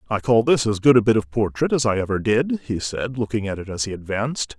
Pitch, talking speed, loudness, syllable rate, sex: 110 Hz, 275 wpm, -21 LUFS, 6.0 syllables/s, male